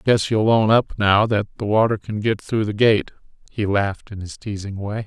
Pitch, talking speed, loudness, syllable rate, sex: 105 Hz, 235 wpm, -20 LUFS, 5.0 syllables/s, male